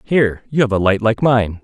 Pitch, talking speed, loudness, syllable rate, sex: 115 Hz, 260 wpm, -16 LUFS, 5.4 syllables/s, male